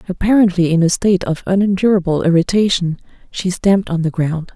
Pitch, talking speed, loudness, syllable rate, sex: 180 Hz, 160 wpm, -15 LUFS, 5.9 syllables/s, female